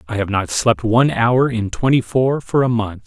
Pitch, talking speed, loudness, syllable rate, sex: 115 Hz, 235 wpm, -17 LUFS, 4.8 syllables/s, male